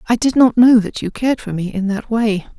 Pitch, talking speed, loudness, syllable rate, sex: 220 Hz, 280 wpm, -16 LUFS, 5.5 syllables/s, female